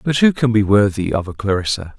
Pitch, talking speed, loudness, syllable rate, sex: 105 Hz, 240 wpm, -17 LUFS, 5.9 syllables/s, male